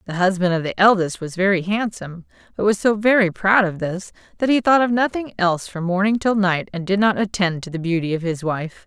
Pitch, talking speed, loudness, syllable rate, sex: 190 Hz, 235 wpm, -19 LUFS, 5.7 syllables/s, female